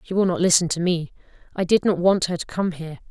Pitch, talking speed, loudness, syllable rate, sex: 175 Hz, 270 wpm, -21 LUFS, 6.4 syllables/s, female